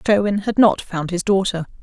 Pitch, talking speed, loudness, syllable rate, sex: 190 Hz, 195 wpm, -18 LUFS, 5.2 syllables/s, female